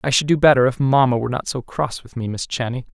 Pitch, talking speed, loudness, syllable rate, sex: 130 Hz, 285 wpm, -19 LUFS, 6.5 syllables/s, male